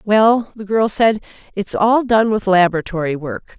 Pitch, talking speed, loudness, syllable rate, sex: 205 Hz, 165 wpm, -16 LUFS, 4.5 syllables/s, female